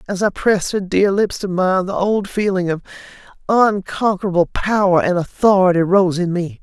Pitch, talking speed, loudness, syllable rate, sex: 190 Hz, 170 wpm, -17 LUFS, 5.0 syllables/s, female